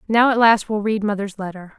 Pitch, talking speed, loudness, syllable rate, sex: 210 Hz, 235 wpm, -18 LUFS, 5.5 syllables/s, female